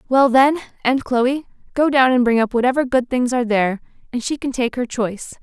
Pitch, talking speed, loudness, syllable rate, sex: 250 Hz, 220 wpm, -18 LUFS, 5.6 syllables/s, female